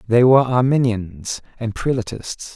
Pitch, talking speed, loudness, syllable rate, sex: 115 Hz, 120 wpm, -19 LUFS, 4.5 syllables/s, male